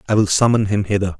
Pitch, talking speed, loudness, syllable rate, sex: 100 Hz, 250 wpm, -17 LUFS, 7.1 syllables/s, male